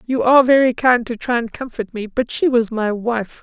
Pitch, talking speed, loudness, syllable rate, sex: 235 Hz, 245 wpm, -17 LUFS, 5.2 syllables/s, female